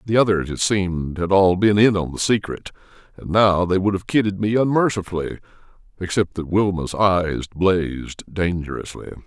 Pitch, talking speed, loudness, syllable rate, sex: 95 Hz, 160 wpm, -20 LUFS, 5.0 syllables/s, male